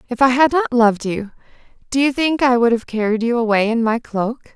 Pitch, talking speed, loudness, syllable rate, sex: 240 Hz, 235 wpm, -17 LUFS, 5.6 syllables/s, female